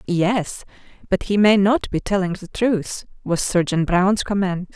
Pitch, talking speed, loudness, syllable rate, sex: 190 Hz, 165 wpm, -20 LUFS, 4.1 syllables/s, female